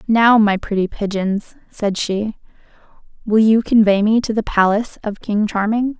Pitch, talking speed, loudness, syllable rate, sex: 215 Hz, 160 wpm, -17 LUFS, 4.6 syllables/s, female